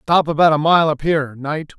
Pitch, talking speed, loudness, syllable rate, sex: 155 Hz, 235 wpm, -16 LUFS, 5.4 syllables/s, male